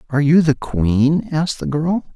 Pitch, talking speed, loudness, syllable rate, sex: 145 Hz, 195 wpm, -17 LUFS, 4.7 syllables/s, male